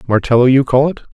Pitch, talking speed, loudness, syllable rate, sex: 130 Hz, 210 wpm, -13 LUFS, 6.5 syllables/s, male